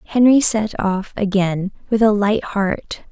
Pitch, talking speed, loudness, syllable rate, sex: 205 Hz, 155 wpm, -17 LUFS, 3.7 syllables/s, female